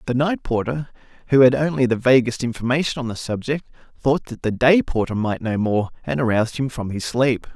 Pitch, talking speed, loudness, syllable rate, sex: 125 Hz, 205 wpm, -20 LUFS, 5.6 syllables/s, male